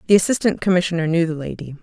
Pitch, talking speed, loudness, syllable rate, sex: 175 Hz, 195 wpm, -19 LUFS, 7.5 syllables/s, female